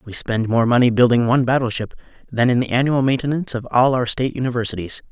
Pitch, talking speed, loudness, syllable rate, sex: 120 Hz, 200 wpm, -18 LUFS, 6.8 syllables/s, male